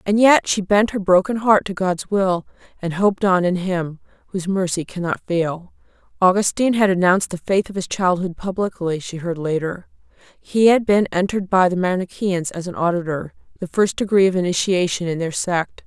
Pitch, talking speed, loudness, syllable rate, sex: 185 Hz, 185 wpm, -19 LUFS, 5.3 syllables/s, female